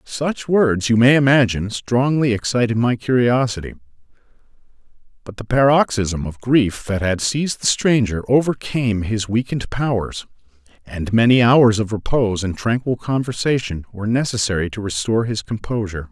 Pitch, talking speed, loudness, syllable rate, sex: 115 Hz, 140 wpm, -18 LUFS, 5.2 syllables/s, male